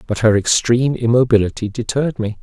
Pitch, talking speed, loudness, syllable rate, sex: 115 Hz, 150 wpm, -16 LUFS, 6.1 syllables/s, male